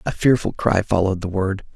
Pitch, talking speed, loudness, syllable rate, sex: 100 Hz, 205 wpm, -20 LUFS, 5.8 syllables/s, male